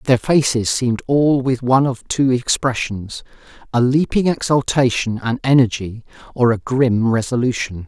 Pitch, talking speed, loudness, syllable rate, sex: 125 Hz, 130 wpm, -17 LUFS, 4.7 syllables/s, male